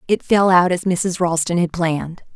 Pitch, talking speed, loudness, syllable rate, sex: 175 Hz, 205 wpm, -17 LUFS, 4.7 syllables/s, female